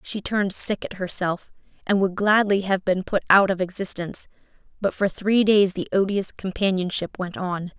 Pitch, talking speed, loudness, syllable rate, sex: 190 Hz, 175 wpm, -22 LUFS, 4.9 syllables/s, female